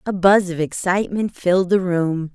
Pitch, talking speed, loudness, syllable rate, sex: 185 Hz, 180 wpm, -19 LUFS, 5.0 syllables/s, female